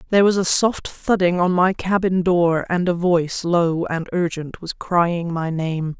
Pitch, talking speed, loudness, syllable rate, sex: 175 Hz, 190 wpm, -19 LUFS, 4.2 syllables/s, female